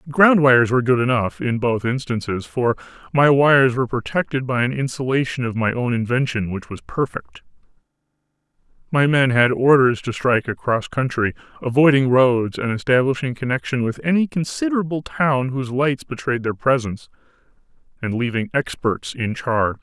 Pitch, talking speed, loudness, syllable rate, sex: 125 Hz, 150 wpm, -19 LUFS, 5.3 syllables/s, male